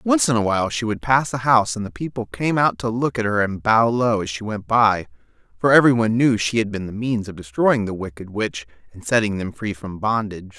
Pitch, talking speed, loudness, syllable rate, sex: 110 Hz, 250 wpm, -20 LUFS, 5.6 syllables/s, male